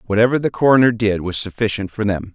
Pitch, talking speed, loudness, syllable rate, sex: 110 Hz, 205 wpm, -17 LUFS, 6.3 syllables/s, male